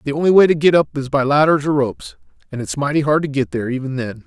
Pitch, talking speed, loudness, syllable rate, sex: 145 Hz, 295 wpm, -17 LUFS, 7.2 syllables/s, male